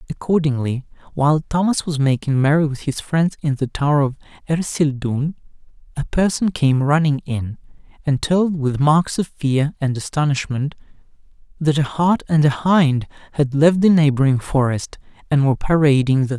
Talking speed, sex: 170 wpm, male